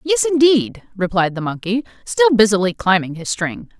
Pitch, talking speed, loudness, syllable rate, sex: 220 Hz, 175 wpm, -17 LUFS, 5.1 syllables/s, female